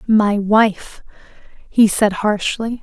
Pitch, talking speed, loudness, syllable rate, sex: 210 Hz, 105 wpm, -16 LUFS, 2.8 syllables/s, female